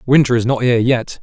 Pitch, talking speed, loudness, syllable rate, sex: 125 Hz, 245 wpm, -15 LUFS, 6.4 syllables/s, male